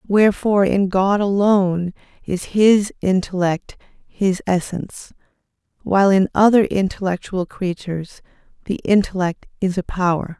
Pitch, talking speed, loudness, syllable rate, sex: 190 Hz, 110 wpm, -18 LUFS, 4.5 syllables/s, female